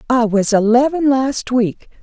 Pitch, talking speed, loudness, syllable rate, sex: 245 Hz, 150 wpm, -15 LUFS, 4.1 syllables/s, female